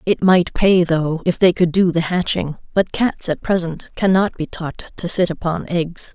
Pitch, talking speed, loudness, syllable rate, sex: 175 Hz, 205 wpm, -18 LUFS, 4.4 syllables/s, female